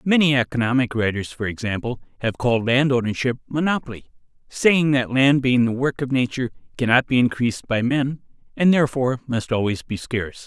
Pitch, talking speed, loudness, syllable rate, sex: 125 Hz, 160 wpm, -21 LUFS, 5.8 syllables/s, male